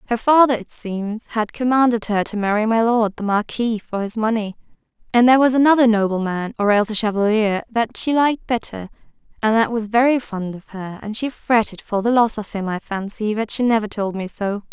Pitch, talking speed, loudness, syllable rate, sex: 220 Hz, 210 wpm, -19 LUFS, 5.5 syllables/s, female